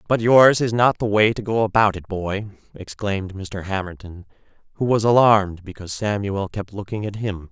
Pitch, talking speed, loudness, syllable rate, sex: 105 Hz, 175 wpm, -20 LUFS, 5.2 syllables/s, male